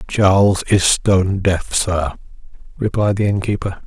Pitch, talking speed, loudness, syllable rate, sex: 95 Hz, 125 wpm, -17 LUFS, 4.3 syllables/s, male